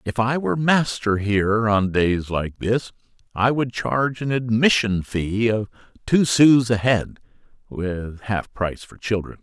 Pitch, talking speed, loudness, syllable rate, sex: 115 Hz, 160 wpm, -21 LUFS, 4.1 syllables/s, male